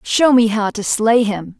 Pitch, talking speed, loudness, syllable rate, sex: 220 Hz, 225 wpm, -15 LUFS, 4.0 syllables/s, female